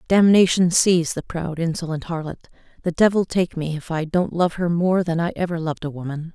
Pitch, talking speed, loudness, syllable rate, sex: 170 Hz, 210 wpm, -21 LUFS, 5.6 syllables/s, female